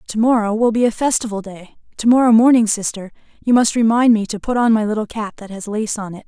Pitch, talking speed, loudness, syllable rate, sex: 220 Hz, 250 wpm, -16 LUFS, 6.1 syllables/s, female